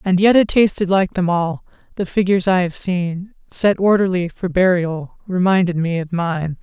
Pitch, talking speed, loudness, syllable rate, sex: 185 Hz, 180 wpm, -17 LUFS, 4.7 syllables/s, female